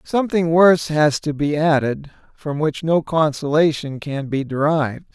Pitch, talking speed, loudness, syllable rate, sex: 150 Hz, 150 wpm, -19 LUFS, 4.6 syllables/s, male